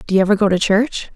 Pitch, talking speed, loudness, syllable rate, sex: 205 Hz, 310 wpm, -16 LUFS, 7.1 syllables/s, female